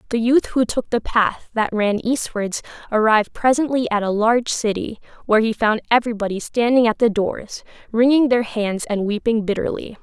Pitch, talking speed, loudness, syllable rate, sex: 225 Hz, 175 wpm, -19 LUFS, 5.3 syllables/s, female